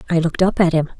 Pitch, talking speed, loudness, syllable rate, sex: 170 Hz, 300 wpm, -17 LUFS, 8.3 syllables/s, female